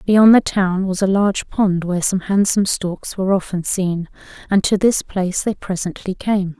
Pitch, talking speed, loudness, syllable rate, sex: 190 Hz, 190 wpm, -18 LUFS, 5.0 syllables/s, female